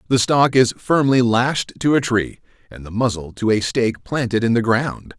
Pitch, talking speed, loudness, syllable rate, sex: 120 Hz, 210 wpm, -18 LUFS, 4.7 syllables/s, male